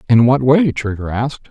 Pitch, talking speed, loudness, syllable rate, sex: 120 Hz, 200 wpm, -15 LUFS, 5.4 syllables/s, male